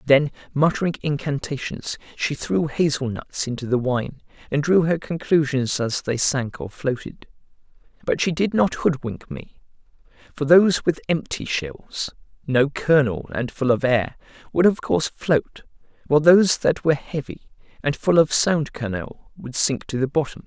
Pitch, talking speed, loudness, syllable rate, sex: 145 Hz, 160 wpm, -21 LUFS, 4.6 syllables/s, male